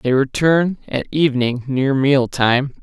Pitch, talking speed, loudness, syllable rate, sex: 135 Hz, 150 wpm, -17 LUFS, 4.0 syllables/s, male